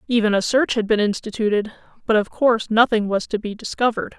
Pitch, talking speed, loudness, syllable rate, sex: 220 Hz, 185 wpm, -20 LUFS, 6.3 syllables/s, female